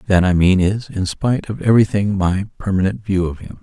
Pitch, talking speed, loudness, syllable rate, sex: 100 Hz, 215 wpm, -17 LUFS, 5.7 syllables/s, male